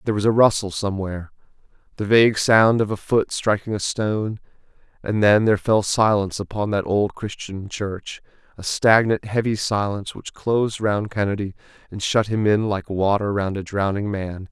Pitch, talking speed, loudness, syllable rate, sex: 105 Hz, 170 wpm, -21 LUFS, 5.2 syllables/s, male